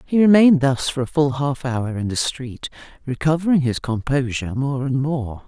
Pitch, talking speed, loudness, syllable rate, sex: 140 Hz, 185 wpm, -19 LUFS, 5.0 syllables/s, female